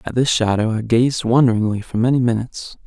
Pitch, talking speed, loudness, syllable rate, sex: 115 Hz, 190 wpm, -17 LUFS, 5.9 syllables/s, male